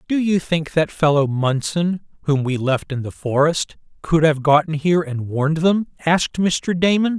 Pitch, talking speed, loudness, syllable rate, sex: 160 Hz, 185 wpm, -19 LUFS, 4.7 syllables/s, male